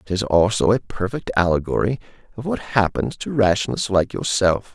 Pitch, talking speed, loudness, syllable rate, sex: 105 Hz, 165 wpm, -20 LUFS, 5.4 syllables/s, male